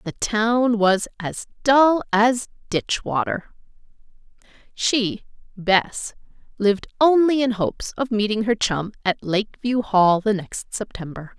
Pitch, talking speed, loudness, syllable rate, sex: 215 Hz, 125 wpm, -21 LUFS, 4.0 syllables/s, female